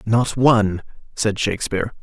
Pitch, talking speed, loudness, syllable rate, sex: 110 Hz, 120 wpm, -19 LUFS, 5.2 syllables/s, male